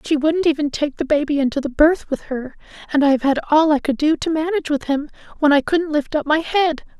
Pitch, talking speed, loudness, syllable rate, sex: 295 Hz, 255 wpm, -18 LUFS, 5.8 syllables/s, female